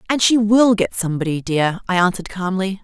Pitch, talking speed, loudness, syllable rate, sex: 195 Hz, 190 wpm, -18 LUFS, 5.9 syllables/s, female